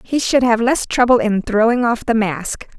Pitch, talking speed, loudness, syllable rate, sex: 230 Hz, 215 wpm, -16 LUFS, 4.6 syllables/s, female